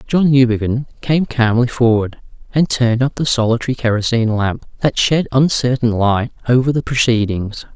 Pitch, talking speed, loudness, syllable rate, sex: 120 Hz, 145 wpm, -16 LUFS, 5.2 syllables/s, male